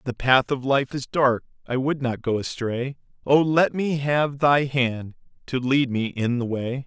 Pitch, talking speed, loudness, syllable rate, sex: 130 Hz, 200 wpm, -23 LUFS, 4.0 syllables/s, male